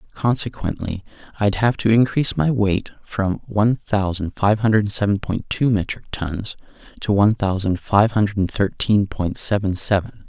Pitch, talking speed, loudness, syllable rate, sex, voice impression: 105 Hz, 150 wpm, -20 LUFS, 4.6 syllables/s, male, masculine, adult-like, slightly dark, refreshing, slightly sincere, reassuring, slightly kind